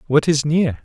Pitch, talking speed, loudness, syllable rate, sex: 145 Hz, 215 wpm, -17 LUFS, 4.7 syllables/s, male